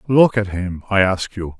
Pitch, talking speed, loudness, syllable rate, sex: 100 Hz, 225 wpm, -18 LUFS, 4.6 syllables/s, male